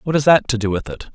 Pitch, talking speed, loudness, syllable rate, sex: 125 Hz, 365 wpm, -17 LUFS, 6.7 syllables/s, male